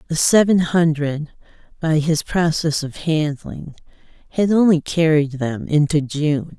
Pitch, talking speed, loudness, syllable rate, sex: 155 Hz, 130 wpm, -18 LUFS, 3.9 syllables/s, female